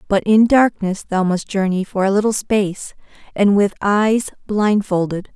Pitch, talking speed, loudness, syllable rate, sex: 200 Hz, 155 wpm, -17 LUFS, 4.5 syllables/s, female